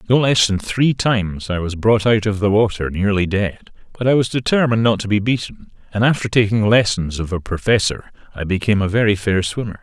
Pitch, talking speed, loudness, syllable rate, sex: 105 Hz, 215 wpm, -17 LUFS, 5.8 syllables/s, male